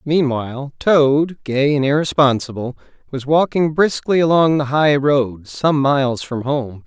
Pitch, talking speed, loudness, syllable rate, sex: 140 Hz, 140 wpm, -17 LUFS, 4.1 syllables/s, male